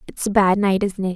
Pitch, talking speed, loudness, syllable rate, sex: 195 Hz, 315 wpm, -19 LUFS, 5.8 syllables/s, female